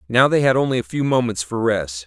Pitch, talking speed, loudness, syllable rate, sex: 110 Hz, 260 wpm, -19 LUFS, 5.8 syllables/s, male